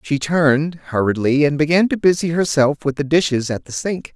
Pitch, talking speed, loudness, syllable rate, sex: 150 Hz, 200 wpm, -17 LUFS, 5.2 syllables/s, male